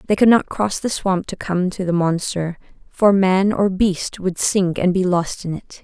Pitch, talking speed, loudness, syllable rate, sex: 185 Hz, 225 wpm, -19 LUFS, 4.3 syllables/s, female